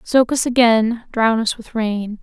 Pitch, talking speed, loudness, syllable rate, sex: 230 Hz, 190 wpm, -17 LUFS, 4.0 syllables/s, female